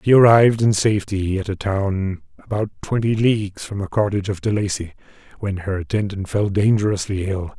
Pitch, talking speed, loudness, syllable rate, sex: 100 Hz, 175 wpm, -20 LUFS, 5.5 syllables/s, male